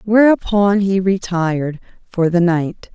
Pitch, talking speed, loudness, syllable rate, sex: 185 Hz, 120 wpm, -16 LUFS, 3.9 syllables/s, female